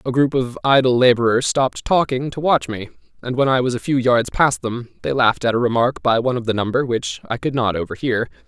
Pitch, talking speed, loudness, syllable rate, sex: 125 Hz, 240 wpm, -18 LUFS, 5.9 syllables/s, male